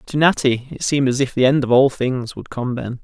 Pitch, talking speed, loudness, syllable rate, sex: 130 Hz, 275 wpm, -18 LUFS, 5.6 syllables/s, male